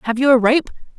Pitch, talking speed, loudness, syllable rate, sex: 250 Hz, 245 wpm, -15 LUFS, 6.5 syllables/s, female